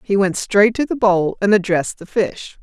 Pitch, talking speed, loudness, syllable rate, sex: 200 Hz, 230 wpm, -17 LUFS, 4.8 syllables/s, female